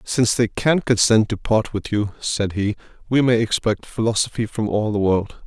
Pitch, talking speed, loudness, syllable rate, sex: 110 Hz, 200 wpm, -20 LUFS, 4.9 syllables/s, male